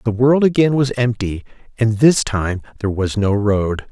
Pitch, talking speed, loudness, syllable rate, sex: 115 Hz, 185 wpm, -17 LUFS, 4.6 syllables/s, male